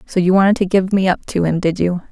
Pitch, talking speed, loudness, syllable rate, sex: 185 Hz, 310 wpm, -16 LUFS, 6.2 syllables/s, female